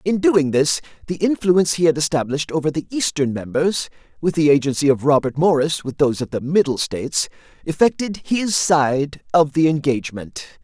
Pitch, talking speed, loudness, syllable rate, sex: 155 Hz, 170 wpm, -19 LUFS, 5.4 syllables/s, male